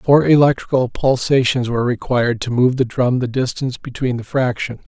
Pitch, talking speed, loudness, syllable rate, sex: 125 Hz, 170 wpm, -17 LUFS, 5.5 syllables/s, male